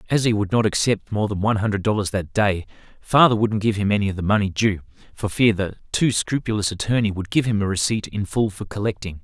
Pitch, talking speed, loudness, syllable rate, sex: 105 Hz, 235 wpm, -21 LUFS, 6.1 syllables/s, male